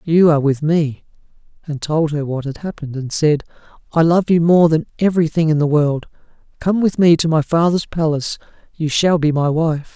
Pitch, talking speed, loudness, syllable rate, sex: 155 Hz, 200 wpm, -17 LUFS, 5.4 syllables/s, male